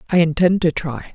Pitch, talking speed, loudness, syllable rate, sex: 165 Hz, 210 wpm, -18 LUFS, 5.8 syllables/s, female